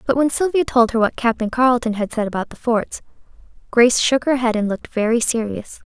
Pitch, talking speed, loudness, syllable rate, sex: 235 Hz, 215 wpm, -18 LUFS, 6.0 syllables/s, female